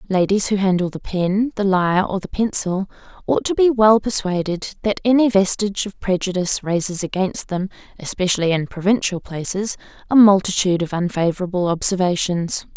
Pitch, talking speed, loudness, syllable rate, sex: 190 Hz, 150 wpm, -19 LUFS, 5.5 syllables/s, female